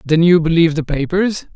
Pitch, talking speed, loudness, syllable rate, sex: 165 Hz, 195 wpm, -15 LUFS, 5.7 syllables/s, male